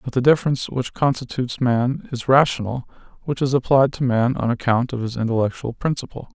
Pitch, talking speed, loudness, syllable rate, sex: 125 Hz, 180 wpm, -20 LUFS, 5.9 syllables/s, male